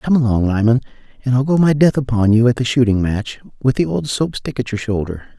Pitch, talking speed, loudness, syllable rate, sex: 120 Hz, 245 wpm, -17 LUFS, 5.7 syllables/s, male